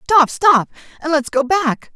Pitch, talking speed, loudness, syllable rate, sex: 300 Hz, 125 wpm, -15 LUFS, 4.0 syllables/s, female